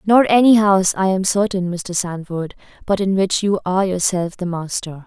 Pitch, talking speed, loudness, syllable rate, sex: 190 Hz, 190 wpm, -18 LUFS, 5.0 syllables/s, female